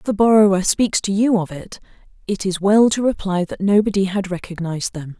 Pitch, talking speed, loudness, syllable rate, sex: 195 Hz, 210 wpm, -18 LUFS, 5.6 syllables/s, female